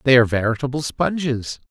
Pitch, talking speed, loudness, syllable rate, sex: 130 Hz, 140 wpm, -20 LUFS, 5.9 syllables/s, male